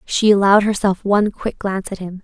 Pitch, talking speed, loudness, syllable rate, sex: 200 Hz, 215 wpm, -17 LUFS, 6.1 syllables/s, female